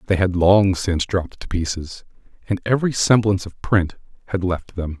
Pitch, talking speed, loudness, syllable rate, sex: 95 Hz, 180 wpm, -20 LUFS, 5.5 syllables/s, male